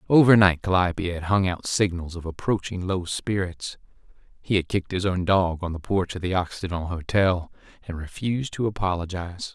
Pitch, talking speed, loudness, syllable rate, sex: 90 Hz, 175 wpm, -24 LUFS, 5.5 syllables/s, male